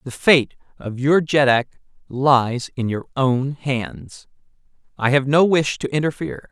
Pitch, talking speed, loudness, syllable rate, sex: 135 Hz, 145 wpm, -19 LUFS, 4.0 syllables/s, male